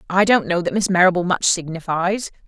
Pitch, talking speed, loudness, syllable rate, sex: 185 Hz, 195 wpm, -18 LUFS, 5.6 syllables/s, female